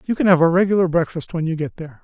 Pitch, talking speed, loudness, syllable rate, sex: 165 Hz, 295 wpm, -18 LUFS, 7.3 syllables/s, male